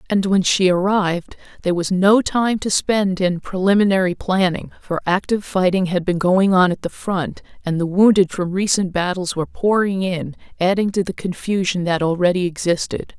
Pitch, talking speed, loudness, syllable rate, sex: 185 Hz, 180 wpm, -18 LUFS, 5.1 syllables/s, female